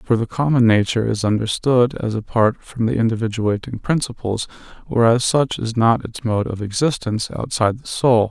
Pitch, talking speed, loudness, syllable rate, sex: 115 Hz, 165 wpm, -19 LUFS, 5.3 syllables/s, male